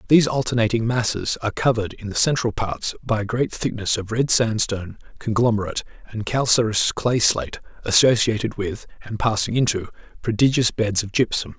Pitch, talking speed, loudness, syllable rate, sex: 110 Hz, 155 wpm, -21 LUFS, 5.7 syllables/s, male